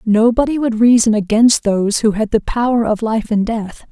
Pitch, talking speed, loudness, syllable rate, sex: 225 Hz, 200 wpm, -15 LUFS, 5.0 syllables/s, female